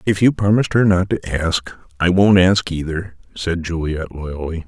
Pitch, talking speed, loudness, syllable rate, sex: 90 Hz, 180 wpm, -18 LUFS, 4.6 syllables/s, male